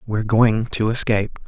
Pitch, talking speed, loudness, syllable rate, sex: 110 Hz, 165 wpm, -19 LUFS, 5.5 syllables/s, male